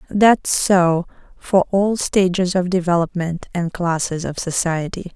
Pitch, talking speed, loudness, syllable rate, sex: 180 Hz, 130 wpm, -18 LUFS, 3.9 syllables/s, female